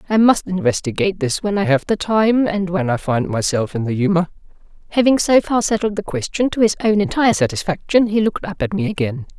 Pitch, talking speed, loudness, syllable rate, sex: 185 Hz, 215 wpm, -18 LUFS, 5.9 syllables/s, female